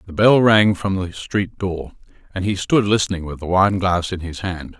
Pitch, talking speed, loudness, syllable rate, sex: 95 Hz, 225 wpm, -19 LUFS, 4.8 syllables/s, male